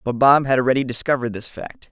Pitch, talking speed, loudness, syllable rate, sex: 130 Hz, 220 wpm, -18 LUFS, 6.6 syllables/s, male